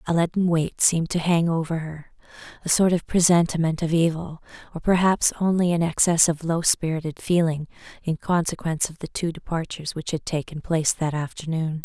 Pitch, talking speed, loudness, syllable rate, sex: 165 Hz, 175 wpm, -23 LUFS, 5.6 syllables/s, female